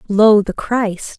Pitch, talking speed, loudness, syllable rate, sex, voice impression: 210 Hz, 150 wpm, -15 LUFS, 3.0 syllables/s, female, very feminine, slightly adult-like, slightly fluent, slightly cute, slightly calm, friendly, slightly kind